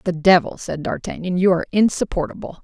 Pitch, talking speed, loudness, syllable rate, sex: 175 Hz, 160 wpm, -19 LUFS, 6.2 syllables/s, female